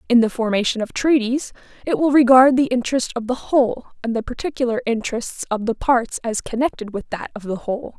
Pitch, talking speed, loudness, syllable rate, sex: 240 Hz, 205 wpm, -20 LUFS, 5.9 syllables/s, female